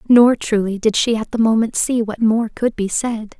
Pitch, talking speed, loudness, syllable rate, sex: 225 Hz, 230 wpm, -17 LUFS, 4.7 syllables/s, female